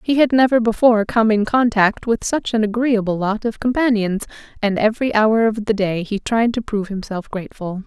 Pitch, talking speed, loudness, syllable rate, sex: 220 Hz, 200 wpm, -18 LUFS, 5.4 syllables/s, female